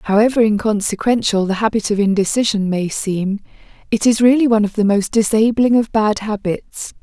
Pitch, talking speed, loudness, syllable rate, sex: 215 Hz, 160 wpm, -16 LUFS, 5.3 syllables/s, female